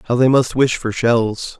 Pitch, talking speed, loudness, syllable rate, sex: 120 Hz, 225 wpm, -16 LUFS, 4.3 syllables/s, male